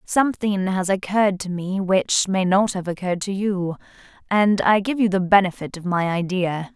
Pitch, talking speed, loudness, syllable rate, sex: 190 Hz, 185 wpm, -21 LUFS, 4.9 syllables/s, female